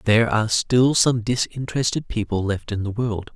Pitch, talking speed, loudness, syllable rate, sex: 110 Hz, 180 wpm, -21 LUFS, 5.3 syllables/s, male